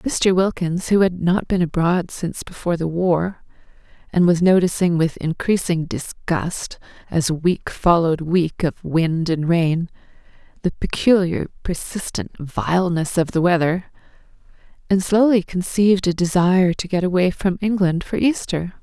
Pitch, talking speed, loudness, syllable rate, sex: 175 Hz, 140 wpm, -19 LUFS, 4.5 syllables/s, female